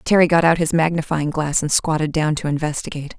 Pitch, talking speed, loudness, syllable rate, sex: 155 Hz, 205 wpm, -19 LUFS, 6.1 syllables/s, female